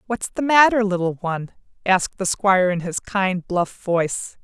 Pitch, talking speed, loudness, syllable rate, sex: 190 Hz, 190 wpm, -20 LUFS, 4.8 syllables/s, female